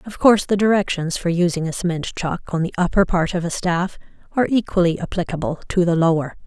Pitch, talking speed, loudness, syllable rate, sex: 180 Hz, 205 wpm, -20 LUFS, 6.1 syllables/s, female